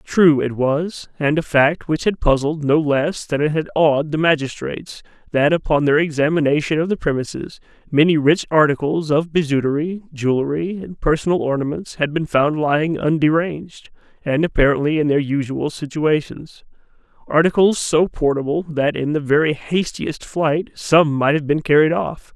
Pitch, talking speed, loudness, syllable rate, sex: 155 Hz, 160 wpm, -18 LUFS, 4.9 syllables/s, male